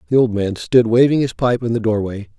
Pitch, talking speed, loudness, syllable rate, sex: 115 Hz, 250 wpm, -17 LUFS, 5.7 syllables/s, male